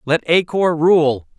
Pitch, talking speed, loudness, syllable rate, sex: 160 Hz, 175 wpm, -16 LUFS, 3.5 syllables/s, male